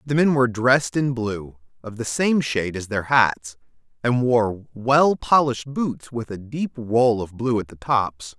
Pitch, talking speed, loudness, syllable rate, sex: 120 Hz, 195 wpm, -21 LUFS, 4.2 syllables/s, male